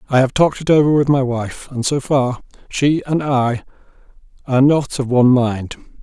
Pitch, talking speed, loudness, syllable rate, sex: 130 Hz, 190 wpm, -16 LUFS, 5.0 syllables/s, male